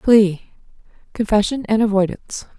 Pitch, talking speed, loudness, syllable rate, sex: 210 Hz, 95 wpm, -18 LUFS, 4.7 syllables/s, female